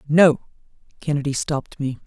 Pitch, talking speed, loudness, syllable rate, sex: 145 Hz, 115 wpm, -21 LUFS, 5.2 syllables/s, female